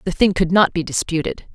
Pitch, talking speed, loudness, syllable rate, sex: 175 Hz, 235 wpm, -18 LUFS, 5.7 syllables/s, female